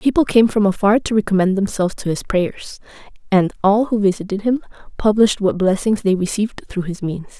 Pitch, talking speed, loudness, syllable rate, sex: 205 Hz, 185 wpm, -18 LUFS, 5.8 syllables/s, female